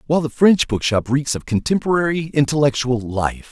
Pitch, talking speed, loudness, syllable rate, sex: 140 Hz, 155 wpm, -18 LUFS, 5.4 syllables/s, male